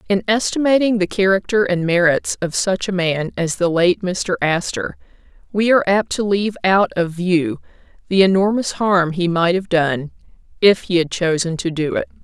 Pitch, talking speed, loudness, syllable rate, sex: 185 Hz, 180 wpm, -17 LUFS, 5.0 syllables/s, female